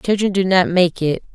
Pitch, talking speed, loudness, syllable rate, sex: 185 Hz, 225 wpm, -17 LUFS, 4.9 syllables/s, female